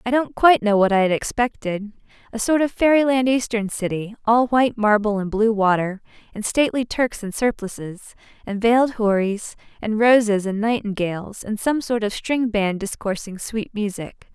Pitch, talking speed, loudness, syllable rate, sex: 220 Hz, 165 wpm, -20 LUFS, 5.0 syllables/s, female